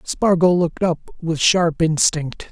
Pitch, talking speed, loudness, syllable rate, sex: 170 Hz, 145 wpm, -18 LUFS, 3.7 syllables/s, male